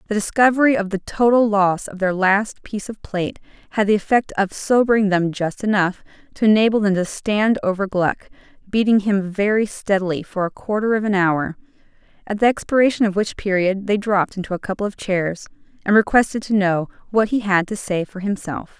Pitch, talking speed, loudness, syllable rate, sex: 200 Hz, 195 wpm, -19 LUFS, 5.5 syllables/s, female